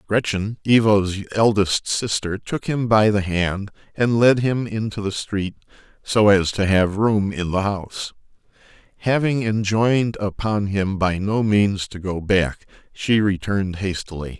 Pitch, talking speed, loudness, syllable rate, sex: 100 Hz, 150 wpm, -20 LUFS, 4.1 syllables/s, male